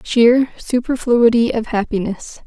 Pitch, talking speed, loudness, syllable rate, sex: 235 Hz, 95 wpm, -16 LUFS, 4.0 syllables/s, female